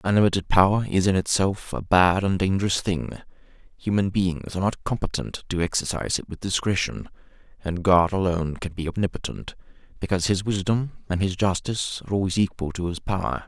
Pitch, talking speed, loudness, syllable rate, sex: 95 Hz, 170 wpm, -24 LUFS, 5.9 syllables/s, male